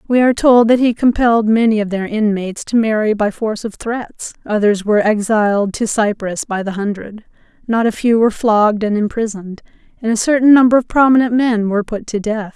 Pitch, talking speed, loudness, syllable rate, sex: 220 Hz, 200 wpm, -15 LUFS, 5.7 syllables/s, female